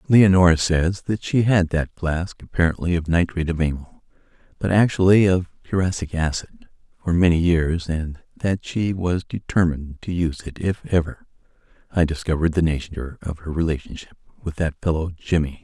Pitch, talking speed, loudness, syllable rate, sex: 85 Hz, 155 wpm, -21 LUFS, 5.3 syllables/s, male